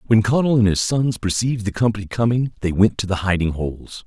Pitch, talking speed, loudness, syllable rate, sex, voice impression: 105 Hz, 220 wpm, -19 LUFS, 6.1 syllables/s, male, masculine, middle-aged, thick, slightly powerful, slightly hard, clear, fluent, cool, sincere, calm, slightly mature, elegant, wild, lively, slightly strict